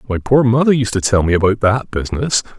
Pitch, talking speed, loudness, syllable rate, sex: 115 Hz, 230 wpm, -15 LUFS, 6.1 syllables/s, male